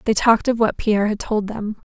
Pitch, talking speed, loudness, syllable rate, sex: 215 Hz, 250 wpm, -19 LUFS, 5.9 syllables/s, female